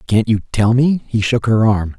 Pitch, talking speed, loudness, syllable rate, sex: 115 Hz, 240 wpm, -15 LUFS, 4.6 syllables/s, male